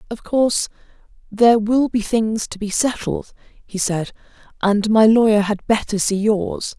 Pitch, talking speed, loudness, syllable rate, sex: 215 Hz, 160 wpm, -18 LUFS, 4.3 syllables/s, female